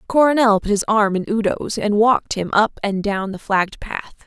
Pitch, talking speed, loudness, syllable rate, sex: 210 Hz, 210 wpm, -18 LUFS, 5.1 syllables/s, female